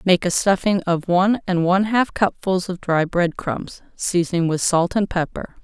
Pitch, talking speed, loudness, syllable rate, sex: 180 Hz, 190 wpm, -20 LUFS, 4.7 syllables/s, female